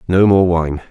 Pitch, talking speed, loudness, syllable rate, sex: 90 Hz, 200 wpm, -14 LUFS, 4.4 syllables/s, male